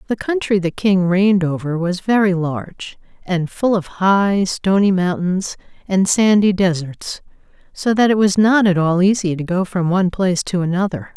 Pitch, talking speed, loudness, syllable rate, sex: 190 Hz, 175 wpm, -17 LUFS, 4.7 syllables/s, female